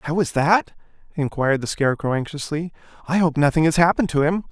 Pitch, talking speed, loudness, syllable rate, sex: 155 Hz, 185 wpm, -20 LUFS, 6.5 syllables/s, male